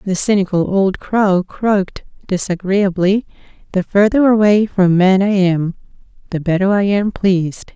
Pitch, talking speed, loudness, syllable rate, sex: 195 Hz, 140 wpm, -15 LUFS, 4.5 syllables/s, female